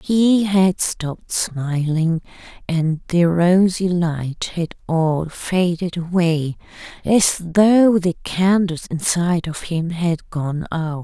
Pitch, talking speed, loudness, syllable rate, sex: 170 Hz, 120 wpm, -19 LUFS, 3.1 syllables/s, female